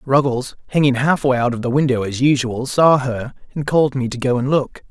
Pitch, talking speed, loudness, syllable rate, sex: 130 Hz, 220 wpm, -18 LUFS, 5.5 syllables/s, male